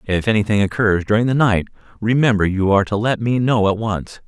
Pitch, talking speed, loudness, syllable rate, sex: 105 Hz, 210 wpm, -17 LUFS, 5.8 syllables/s, male